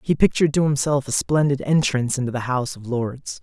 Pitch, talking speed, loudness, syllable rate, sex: 135 Hz, 210 wpm, -21 LUFS, 6.0 syllables/s, male